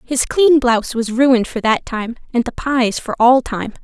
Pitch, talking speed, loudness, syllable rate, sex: 245 Hz, 220 wpm, -16 LUFS, 4.7 syllables/s, female